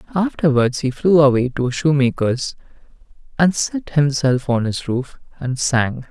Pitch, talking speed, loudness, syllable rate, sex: 140 Hz, 145 wpm, -18 LUFS, 4.4 syllables/s, male